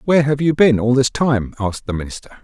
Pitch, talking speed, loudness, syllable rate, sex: 125 Hz, 245 wpm, -17 LUFS, 6.5 syllables/s, male